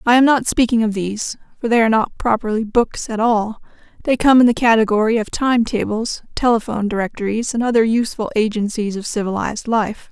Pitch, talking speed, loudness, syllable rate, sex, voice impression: 225 Hz, 185 wpm, -17 LUFS, 5.9 syllables/s, female, feminine, adult-like, tensed, slightly hard, clear, fluent, intellectual, calm, elegant, slightly strict, slightly intense